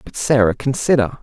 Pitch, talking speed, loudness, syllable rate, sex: 120 Hz, 145 wpm, -17 LUFS, 5.4 syllables/s, male